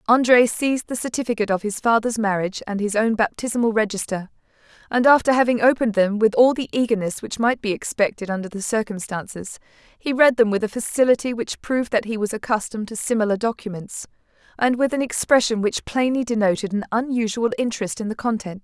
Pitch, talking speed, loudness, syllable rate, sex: 225 Hz, 185 wpm, -21 LUFS, 6.1 syllables/s, female